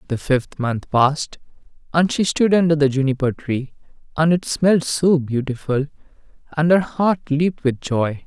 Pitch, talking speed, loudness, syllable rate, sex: 150 Hz, 160 wpm, -19 LUFS, 4.5 syllables/s, male